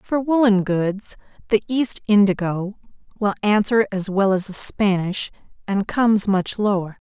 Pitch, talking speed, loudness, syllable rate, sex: 205 Hz, 145 wpm, -20 LUFS, 4.3 syllables/s, female